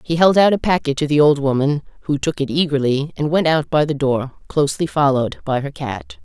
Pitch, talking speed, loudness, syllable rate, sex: 150 Hz, 230 wpm, -18 LUFS, 5.6 syllables/s, female